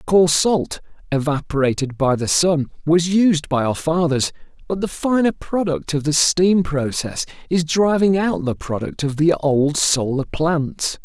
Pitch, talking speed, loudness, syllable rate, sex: 160 Hz, 160 wpm, -19 LUFS, 4.2 syllables/s, male